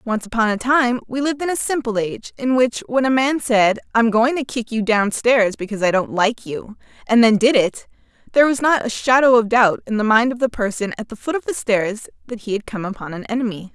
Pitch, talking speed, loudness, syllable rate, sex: 230 Hz, 250 wpm, -18 LUFS, 5.8 syllables/s, female